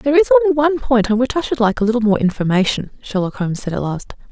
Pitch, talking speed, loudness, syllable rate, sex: 220 Hz, 265 wpm, -17 LUFS, 7.7 syllables/s, female